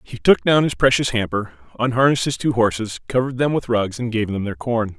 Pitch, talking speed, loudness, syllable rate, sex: 115 Hz, 230 wpm, -19 LUFS, 5.9 syllables/s, male